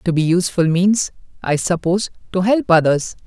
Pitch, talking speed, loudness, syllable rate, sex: 180 Hz, 165 wpm, -17 LUFS, 5.5 syllables/s, male